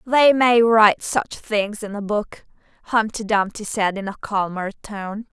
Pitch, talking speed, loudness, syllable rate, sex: 210 Hz, 165 wpm, -20 LUFS, 4.1 syllables/s, female